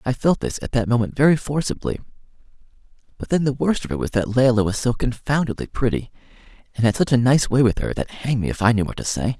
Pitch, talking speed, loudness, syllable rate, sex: 120 Hz, 245 wpm, -21 LUFS, 6.3 syllables/s, male